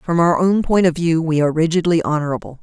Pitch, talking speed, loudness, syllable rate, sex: 165 Hz, 230 wpm, -17 LUFS, 6.5 syllables/s, female